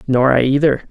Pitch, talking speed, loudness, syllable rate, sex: 135 Hz, 200 wpm, -14 LUFS, 5.2 syllables/s, male